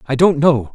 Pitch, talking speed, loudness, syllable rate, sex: 145 Hz, 245 wpm, -14 LUFS, 4.8 syllables/s, male